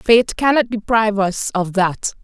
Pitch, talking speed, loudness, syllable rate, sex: 210 Hz, 160 wpm, -17 LUFS, 4.3 syllables/s, female